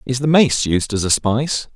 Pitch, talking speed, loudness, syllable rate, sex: 125 Hz, 240 wpm, -17 LUFS, 5.0 syllables/s, male